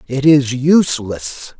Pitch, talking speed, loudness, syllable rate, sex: 140 Hz, 115 wpm, -14 LUFS, 3.6 syllables/s, male